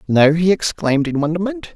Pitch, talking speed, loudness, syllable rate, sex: 170 Hz, 170 wpm, -17 LUFS, 5.8 syllables/s, male